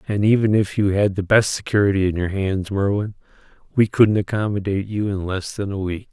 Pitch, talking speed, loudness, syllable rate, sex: 100 Hz, 205 wpm, -20 LUFS, 5.6 syllables/s, male